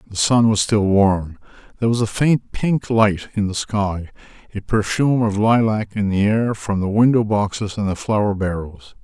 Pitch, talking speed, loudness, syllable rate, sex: 105 Hz, 185 wpm, -19 LUFS, 4.6 syllables/s, male